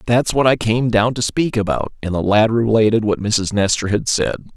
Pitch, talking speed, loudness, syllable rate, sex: 110 Hz, 225 wpm, -17 LUFS, 5.1 syllables/s, male